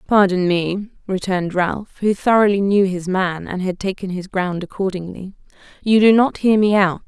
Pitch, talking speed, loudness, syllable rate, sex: 190 Hz, 180 wpm, -18 LUFS, 4.8 syllables/s, female